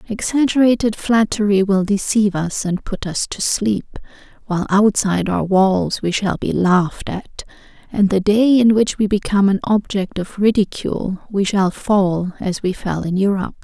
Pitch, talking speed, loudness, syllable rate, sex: 200 Hz, 165 wpm, -17 LUFS, 4.8 syllables/s, female